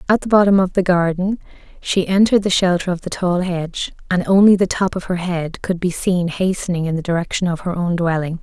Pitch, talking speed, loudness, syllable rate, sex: 180 Hz, 230 wpm, -18 LUFS, 5.7 syllables/s, female